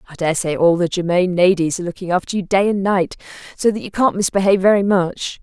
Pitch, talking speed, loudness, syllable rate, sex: 185 Hz, 220 wpm, -17 LUFS, 6.5 syllables/s, female